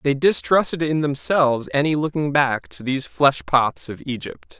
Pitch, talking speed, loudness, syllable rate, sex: 140 Hz, 170 wpm, -20 LUFS, 4.7 syllables/s, male